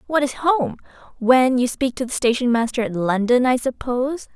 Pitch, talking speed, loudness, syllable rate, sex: 250 Hz, 195 wpm, -20 LUFS, 5.1 syllables/s, female